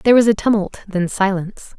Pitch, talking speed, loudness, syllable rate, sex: 205 Hz, 200 wpm, -17 LUFS, 6.3 syllables/s, female